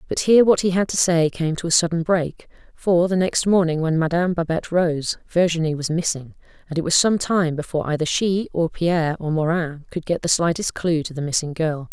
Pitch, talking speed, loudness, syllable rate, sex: 165 Hz, 220 wpm, -20 LUFS, 5.6 syllables/s, female